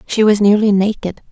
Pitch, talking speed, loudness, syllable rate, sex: 205 Hz, 180 wpm, -13 LUFS, 5.4 syllables/s, female